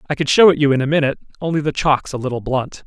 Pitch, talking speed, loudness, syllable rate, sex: 145 Hz, 295 wpm, -17 LUFS, 7.4 syllables/s, male